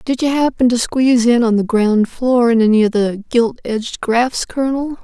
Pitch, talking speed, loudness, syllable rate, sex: 240 Hz, 215 wpm, -15 LUFS, 5.0 syllables/s, female